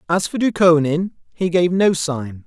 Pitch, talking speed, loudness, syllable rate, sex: 170 Hz, 170 wpm, -18 LUFS, 4.4 syllables/s, male